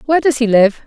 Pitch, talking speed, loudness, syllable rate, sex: 250 Hz, 280 wpm, -13 LUFS, 7.1 syllables/s, female